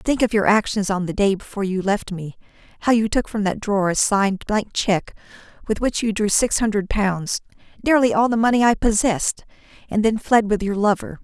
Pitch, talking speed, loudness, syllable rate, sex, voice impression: 210 Hz, 205 wpm, -20 LUFS, 5.7 syllables/s, female, feminine, adult-like, soft, sincere, calm, friendly, reassuring, kind